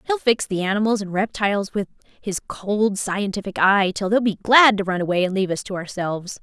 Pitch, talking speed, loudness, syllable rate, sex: 200 Hz, 215 wpm, -20 LUFS, 5.6 syllables/s, female